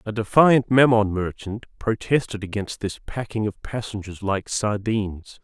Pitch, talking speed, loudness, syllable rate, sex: 105 Hz, 135 wpm, -22 LUFS, 4.5 syllables/s, male